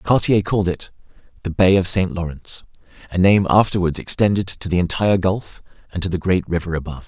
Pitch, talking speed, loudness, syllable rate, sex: 90 Hz, 180 wpm, -19 LUFS, 6.2 syllables/s, male